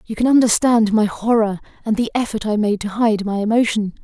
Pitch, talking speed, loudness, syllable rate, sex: 220 Hz, 210 wpm, -17 LUFS, 5.6 syllables/s, female